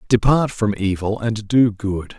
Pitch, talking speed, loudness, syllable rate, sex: 110 Hz, 165 wpm, -19 LUFS, 4.0 syllables/s, male